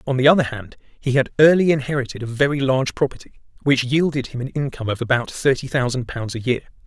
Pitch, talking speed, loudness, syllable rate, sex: 130 Hz, 210 wpm, -20 LUFS, 6.4 syllables/s, male